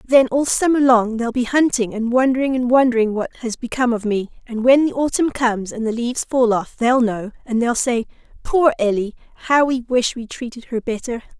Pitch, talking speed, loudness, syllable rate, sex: 240 Hz, 210 wpm, -18 LUFS, 5.5 syllables/s, female